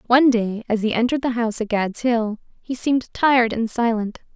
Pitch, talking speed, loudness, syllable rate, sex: 235 Hz, 205 wpm, -20 LUFS, 5.8 syllables/s, female